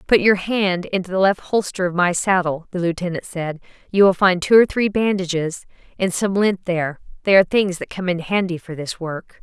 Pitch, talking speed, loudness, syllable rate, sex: 185 Hz, 215 wpm, -19 LUFS, 5.2 syllables/s, female